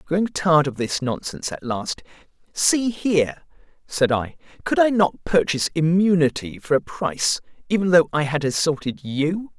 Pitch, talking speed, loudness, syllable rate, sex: 165 Hz, 155 wpm, -21 LUFS, 5.0 syllables/s, male